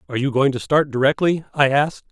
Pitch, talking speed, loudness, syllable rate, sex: 135 Hz, 225 wpm, -19 LUFS, 6.7 syllables/s, male